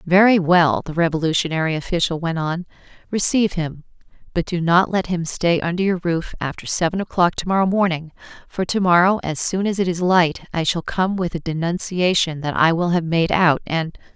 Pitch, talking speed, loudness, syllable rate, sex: 175 Hz, 195 wpm, -19 LUFS, 5.4 syllables/s, female